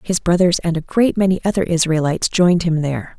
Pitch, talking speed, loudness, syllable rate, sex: 175 Hz, 205 wpm, -17 LUFS, 6.3 syllables/s, female